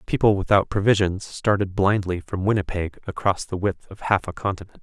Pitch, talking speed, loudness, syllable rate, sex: 95 Hz, 175 wpm, -23 LUFS, 5.5 syllables/s, male